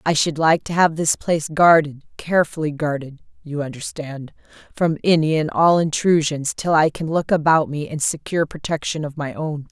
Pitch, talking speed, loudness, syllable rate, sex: 155 Hz, 165 wpm, -19 LUFS, 5.2 syllables/s, female